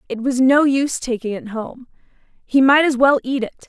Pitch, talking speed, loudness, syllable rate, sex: 255 Hz, 210 wpm, -17 LUFS, 5.4 syllables/s, female